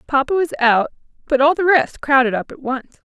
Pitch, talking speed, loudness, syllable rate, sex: 275 Hz, 210 wpm, -17 LUFS, 5.3 syllables/s, female